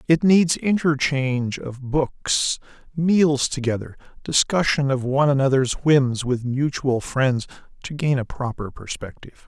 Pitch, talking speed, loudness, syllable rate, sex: 135 Hz, 125 wpm, -21 LUFS, 4.2 syllables/s, male